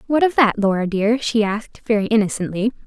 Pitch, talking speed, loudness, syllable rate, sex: 220 Hz, 190 wpm, -19 LUFS, 5.9 syllables/s, female